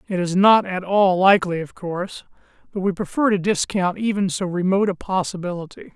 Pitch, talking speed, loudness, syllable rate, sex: 185 Hz, 180 wpm, -20 LUFS, 5.7 syllables/s, male